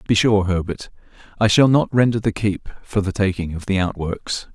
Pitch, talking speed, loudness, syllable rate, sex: 100 Hz, 200 wpm, -19 LUFS, 4.9 syllables/s, male